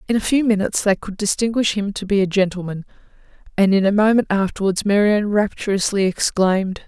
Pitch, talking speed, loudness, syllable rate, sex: 200 Hz, 175 wpm, -18 LUFS, 6.0 syllables/s, female